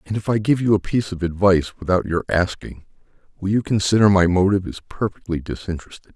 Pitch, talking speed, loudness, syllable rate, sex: 95 Hz, 195 wpm, -20 LUFS, 6.5 syllables/s, male